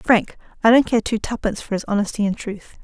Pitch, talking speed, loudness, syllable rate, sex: 215 Hz, 210 wpm, -20 LUFS, 5.9 syllables/s, female